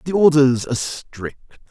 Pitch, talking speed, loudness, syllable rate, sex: 140 Hz, 140 wpm, -17 LUFS, 4.8 syllables/s, male